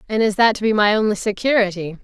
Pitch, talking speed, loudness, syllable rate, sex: 210 Hz, 235 wpm, -17 LUFS, 6.6 syllables/s, female